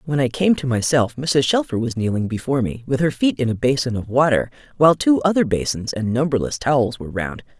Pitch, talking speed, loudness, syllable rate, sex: 130 Hz, 220 wpm, -19 LUFS, 6.0 syllables/s, female